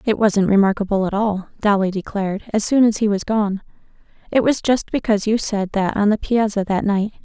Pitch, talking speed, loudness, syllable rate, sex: 205 Hz, 205 wpm, -19 LUFS, 5.5 syllables/s, female